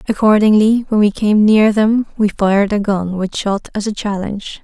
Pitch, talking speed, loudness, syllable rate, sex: 210 Hz, 195 wpm, -14 LUFS, 5.0 syllables/s, female